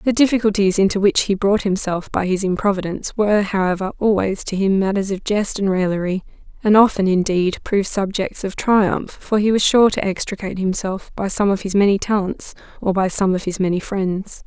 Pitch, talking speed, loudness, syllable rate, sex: 195 Hz, 195 wpm, -18 LUFS, 5.5 syllables/s, female